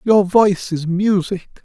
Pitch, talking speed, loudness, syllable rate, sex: 190 Hz, 145 wpm, -16 LUFS, 3.9 syllables/s, male